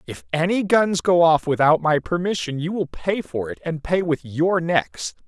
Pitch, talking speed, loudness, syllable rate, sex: 165 Hz, 205 wpm, -21 LUFS, 4.4 syllables/s, male